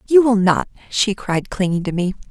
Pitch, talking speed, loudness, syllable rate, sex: 200 Hz, 210 wpm, -18 LUFS, 5.0 syllables/s, female